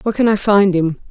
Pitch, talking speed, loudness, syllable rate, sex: 195 Hz, 270 wpm, -14 LUFS, 6.5 syllables/s, female